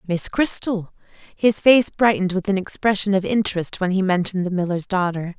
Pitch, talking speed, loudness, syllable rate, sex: 190 Hz, 180 wpm, -20 LUFS, 5.5 syllables/s, female